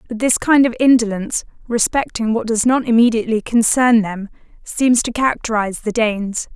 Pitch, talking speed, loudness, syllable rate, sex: 230 Hz, 155 wpm, -16 LUFS, 5.6 syllables/s, female